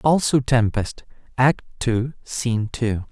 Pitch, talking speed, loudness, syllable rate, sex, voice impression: 120 Hz, 115 wpm, -21 LUFS, 3.7 syllables/s, male, masculine, adult-like, refreshing, sincere, slightly kind